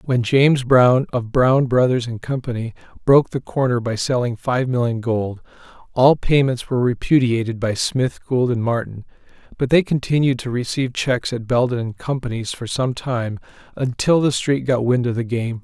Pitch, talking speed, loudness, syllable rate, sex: 125 Hz, 175 wpm, -19 LUFS, 5.0 syllables/s, male